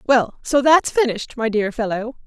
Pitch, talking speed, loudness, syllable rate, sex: 240 Hz, 185 wpm, -19 LUFS, 5.0 syllables/s, female